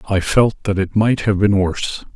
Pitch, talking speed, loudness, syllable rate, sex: 100 Hz, 225 wpm, -17 LUFS, 5.0 syllables/s, male